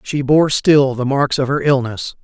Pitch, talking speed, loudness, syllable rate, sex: 135 Hz, 215 wpm, -15 LUFS, 4.4 syllables/s, male